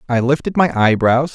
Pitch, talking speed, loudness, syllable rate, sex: 130 Hz, 180 wpm, -15 LUFS, 5.1 syllables/s, male